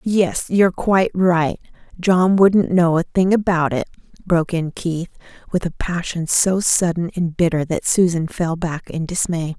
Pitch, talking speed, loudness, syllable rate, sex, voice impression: 175 Hz, 165 wpm, -18 LUFS, 4.4 syllables/s, female, feminine, middle-aged, powerful, slightly hard, raspy, slightly friendly, lively, intense, sharp